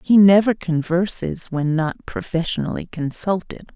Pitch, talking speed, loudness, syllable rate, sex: 175 Hz, 110 wpm, -20 LUFS, 4.4 syllables/s, female